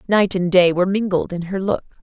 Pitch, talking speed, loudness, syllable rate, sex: 185 Hz, 235 wpm, -18 LUFS, 5.9 syllables/s, female